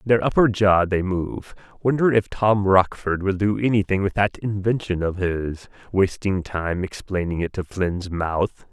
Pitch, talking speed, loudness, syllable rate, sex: 95 Hz, 165 wpm, -22 LUFS, 4.2 syllables/s, male